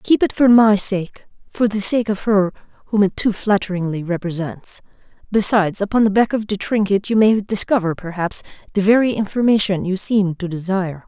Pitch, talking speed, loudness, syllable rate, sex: 200 Hz, 175 wpm, -18 LUFS, 5.4 syllables/s, female